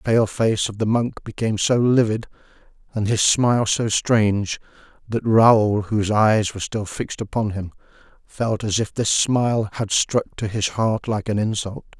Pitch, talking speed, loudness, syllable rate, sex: 110 Hz, 180 wpm, -20 LUFS, 4.7 syllables/s, male